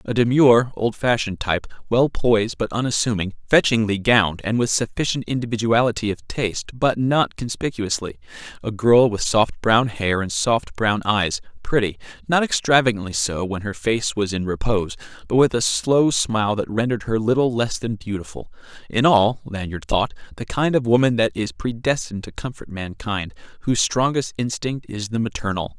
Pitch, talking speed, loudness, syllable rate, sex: 110 Hz, 165 wpm, -21 LUFS, 5.2 syllables/s, male